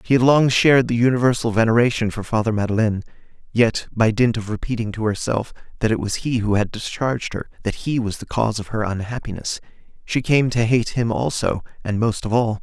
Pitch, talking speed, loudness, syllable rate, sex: 115 Hz, 205 wpm, -20 LUFS, 5.9 syllables/s, male